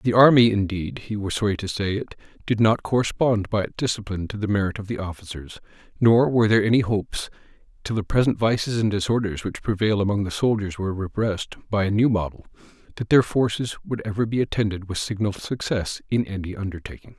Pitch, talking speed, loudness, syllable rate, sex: 105 Hz, 195 wpm, -23 LUFS, 6.2 syllables/s, male